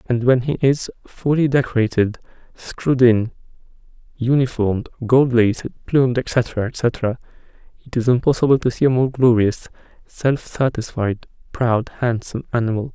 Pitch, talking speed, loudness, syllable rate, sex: 120 Hz, 120 wpm, -19 LUFS, 4.7 syllables/s, male